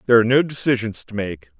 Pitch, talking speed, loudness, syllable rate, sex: 115 Hz, 225 wpm, -20 LUFS, 7.4 syllables/s, male